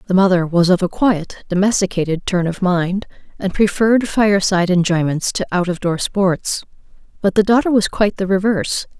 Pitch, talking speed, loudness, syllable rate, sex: 190 Hz, 180 wpm, -17 LUFS, 5.2 syllables/s, female